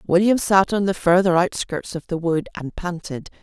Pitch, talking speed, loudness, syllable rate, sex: 180 Hz, 195 wpm, -20 LUFS, 4.8 syllables/s, female